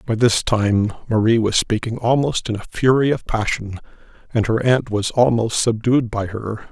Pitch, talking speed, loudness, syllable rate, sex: 115 Hz, 180 wpm, -19 LUFS, 4.7 syllables/s, male